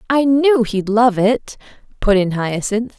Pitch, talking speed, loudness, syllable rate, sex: 225 Hz, 160 wpm, -16 LUFS, 3.8 syllables/s, female